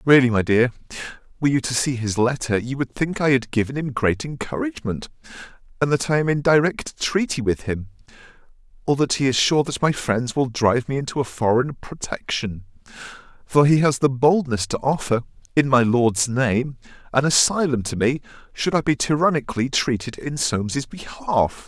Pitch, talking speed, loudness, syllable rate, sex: 130 Hz, 180 wpm, -21 LUFS, 5.2 syllables/s, male